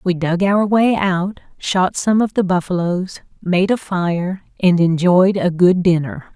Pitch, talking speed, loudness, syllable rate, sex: 185 Hz, 170 wpm, -16 LUFS, 3.9 syllables/s, female